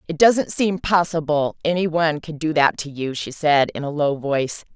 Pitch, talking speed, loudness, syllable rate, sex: 155 Hz, 215 wpm, -20 LUFS, 5.0 syllables/s, female